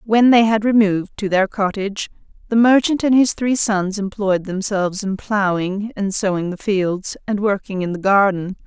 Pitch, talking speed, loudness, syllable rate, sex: 205 Hz, 180 wpm, -18 LUFS, 4.8 syllables/s, female